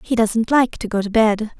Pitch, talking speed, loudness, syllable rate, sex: 220 Hz, 265 wpm, -18 LUFS, 4.9 syllables/s, female